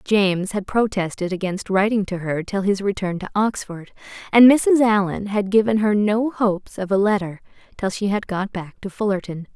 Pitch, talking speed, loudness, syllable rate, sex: 200 Hz, 190 wpm, -20 LUFS, 5.0 syllables/s, female